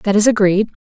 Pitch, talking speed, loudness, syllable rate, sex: 205 Hz, 220 wpm, -14 LUFS, 5.8 syllables/s, female